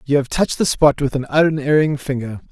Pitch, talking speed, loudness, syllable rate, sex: 145 Hz, 215 wpm, -17 LUFS, 5.7 syllables/s, male